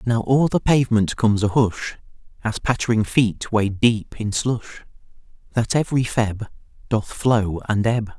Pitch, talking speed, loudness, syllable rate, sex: 115 Hz, 155 wpm, -21 LUFS, 4.5 syllables/s, male